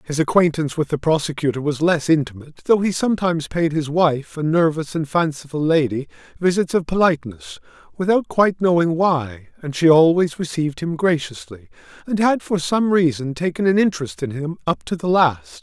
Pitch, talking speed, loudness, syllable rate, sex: 160 Hz, 175 wpm, -19 LUFS, 5.5 syllables/s, male